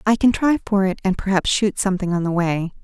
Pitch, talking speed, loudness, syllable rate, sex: 195 Hz, 255 wpm, -19 LUFS, 6.0 syllables/s, female